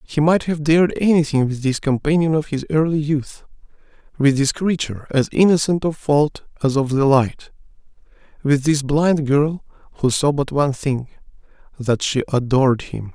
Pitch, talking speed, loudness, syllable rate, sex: 145 Hz, 160 wpm, -18 LUFS, 5.0 syllables/s, male